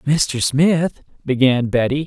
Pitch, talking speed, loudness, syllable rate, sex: 140 Hz, 115 wpm, -17 LUFS, 3.3 syllables/s, male